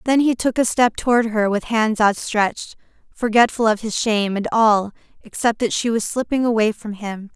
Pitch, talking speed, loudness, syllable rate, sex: 220 Hz, 195 wpm, -19 LUFS, 5.1 syllables/s, female